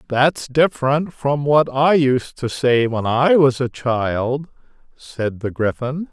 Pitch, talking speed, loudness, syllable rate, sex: 135 Hz, 155 wpm, -18 LUFS, 3.5 syllables/s, male